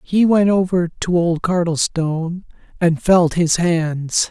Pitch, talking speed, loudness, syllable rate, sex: 170 Hz, 140 wpm, -17 LUFS, 3.6 syllables/s, male